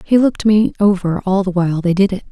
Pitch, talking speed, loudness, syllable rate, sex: 190 Hz, 260 wpm, -15 LUFS, 6.2 syllables/s, female